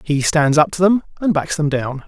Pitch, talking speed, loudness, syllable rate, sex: 155 Hz, 260 wpm, -17 LUFS, 5.0 syllables/s, male